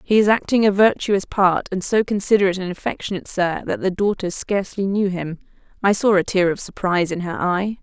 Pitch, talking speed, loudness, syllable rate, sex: 190 Hz, 205 wpm, -20 LUFS, 5.8 syllables/s, female